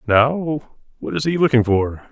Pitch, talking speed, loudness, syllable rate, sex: 130 Hz, 170 wpm, -19 LUFS, 4.7 syllables/s, male